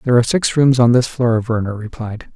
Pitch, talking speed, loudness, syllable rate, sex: 120 Hz, 230 wpm, -16 LUFS, 6.0 syllables/s, male